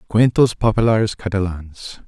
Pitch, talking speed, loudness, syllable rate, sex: 100 Hz, 85 wpm, -17 LUFS, 4.5 syllables/s, male